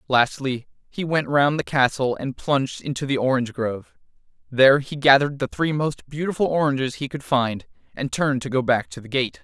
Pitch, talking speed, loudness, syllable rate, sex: 135 Hz, 195 wpm, -22 LUFS, 5.6 syllables/s, male